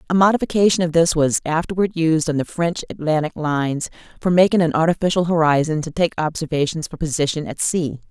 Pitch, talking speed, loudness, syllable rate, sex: 165 Hz, 180 wpm, -19 LUFS, 6.0 syllables/s, female